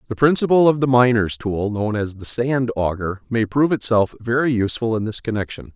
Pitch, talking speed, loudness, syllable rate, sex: 115 Hz, 200 wpm, -19 LUFS, 5.6 syllables/s, male